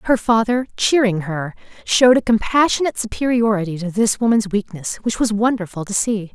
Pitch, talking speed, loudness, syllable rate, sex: 215 Hz, 160 wpm, -18 LUFS, 5.5 syllables/s, female